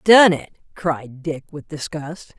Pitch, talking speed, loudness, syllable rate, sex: 160 Hz, 150 wpm, -20 LUFS, 3.5 syllables/s, female